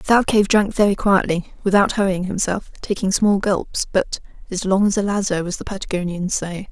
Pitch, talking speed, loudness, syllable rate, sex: 195 Hz, 180 wpm, -19 LUFS, 5.3 syllables/s, female